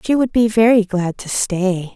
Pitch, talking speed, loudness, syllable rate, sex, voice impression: 210 Hz, 215 wpm, -16 LUFS, 4.3 syllables/s, female, feminine, adult-like, slightly middle-aged, very thin, slightly relaxed, slightly weak, slightly dark, slightly hard, clear, fluent, cute, intellectual, slightly refreshing, sincere, calm, friendly, slightly reassuring, unique, sweet, slightly lively, very kind, modest, slightly light